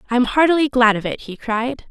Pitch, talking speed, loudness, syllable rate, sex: 245 Hz, 250 wpm, -17 LUFS, 6.0 syllables/s, female